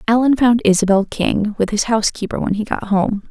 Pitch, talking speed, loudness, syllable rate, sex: 215 Hz, 200 wpm, -17 LUFS, 5.5 syllables/s, female